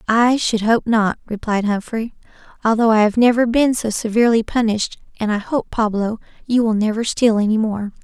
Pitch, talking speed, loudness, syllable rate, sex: 225 Hz, 180 wpm, -18 LUFS, 5.4 syllables/s, female